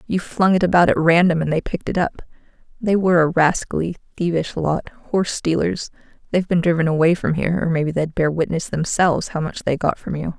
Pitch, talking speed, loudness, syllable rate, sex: 170 Hz, 215 wpm, -19 LUFS, 6.0 syllables/s, female